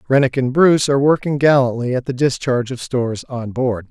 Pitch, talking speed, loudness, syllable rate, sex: 130 Hz, 200 wpm, -17 LUFS, 5.9 syllables/s, male